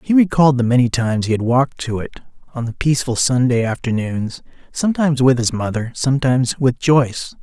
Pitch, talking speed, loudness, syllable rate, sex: 130 Hz, 180 wpm, -17 LUFS, 6.1 syllables/s, male